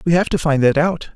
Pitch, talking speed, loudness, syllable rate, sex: 155 Hz, 310 wpm, -17 LUFS, 5.7 syllables/s, male